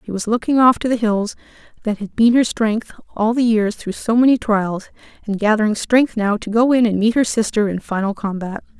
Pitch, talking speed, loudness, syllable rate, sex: 220 Hz, 225 wpm, -17 LUFS, 5.4 syllables/s, female